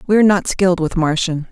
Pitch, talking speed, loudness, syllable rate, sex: 180 Hz, 235 wpm, -16 LUFS, 6.6 syllables/s, female